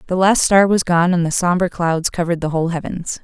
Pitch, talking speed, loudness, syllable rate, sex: 175 Hz, 240 wpm, -17 LUFS, 5.9 syllables/s, female